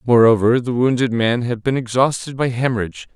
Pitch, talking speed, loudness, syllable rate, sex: 120 Hz, 170 wpm, -18 LUFS, 5.7 syllables/s, male